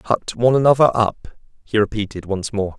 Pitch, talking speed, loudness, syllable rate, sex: 110 Hz, 170 wpm, -18 LUFS, 5.3 syllables/s, male